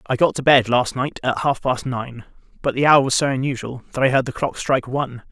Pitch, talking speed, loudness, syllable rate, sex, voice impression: 130 Hz, 260 wpm, -19 LUFS, 5.8 syllables/s, male, very masculine, very adult-like, old, very thick, tensed, slightly powerful, bright, hard, muffled, fluent, slightly raspy, slightly cool, slightly intellectual, refreshing, sincere, calm, mature, slightly friendly, slightly reassuring, unique, slightly elegant, slightly wild, slightly sweet, slightly lively, kind, slightly modest